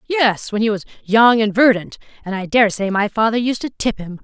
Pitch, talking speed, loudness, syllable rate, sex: 220 Hz, 225 wpm, -17 LUFS, 5.4 syllables/s, female